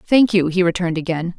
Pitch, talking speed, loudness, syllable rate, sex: 180 Hz, 215 wpm, -18 LUFS, 6.2 syllables/s, female